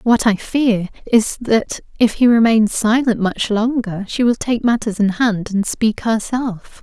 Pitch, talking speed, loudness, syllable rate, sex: 220 Hz, 175 wpm, -17 LUFS, 3.9 syllables/s, female